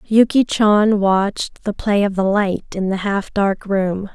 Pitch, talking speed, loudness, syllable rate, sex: 200 Hz, 190 wpm, -17 LUFS, 3.8 syllables/s, female